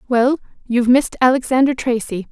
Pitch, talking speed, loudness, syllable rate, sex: 250 Hz, 130 wpm, -17 LUFS, 6.1 syllables/s, female